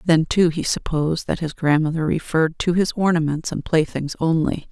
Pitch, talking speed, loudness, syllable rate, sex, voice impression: 160 Hz, 180 wpm, -20 LUFS, 5.3 syllables/s, female, feminine, very adult-like, slightly intellectual, calm, reassuring, elegant